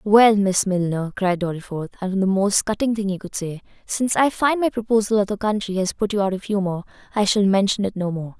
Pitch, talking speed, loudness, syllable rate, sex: 200 Hz, 235 wpm, -21 LUFS, 4.8 syllables/s, female